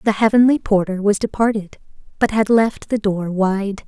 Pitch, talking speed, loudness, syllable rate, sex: 210 Hz, 170 wpm, -18 LUFS, 4.8 syllables/s, female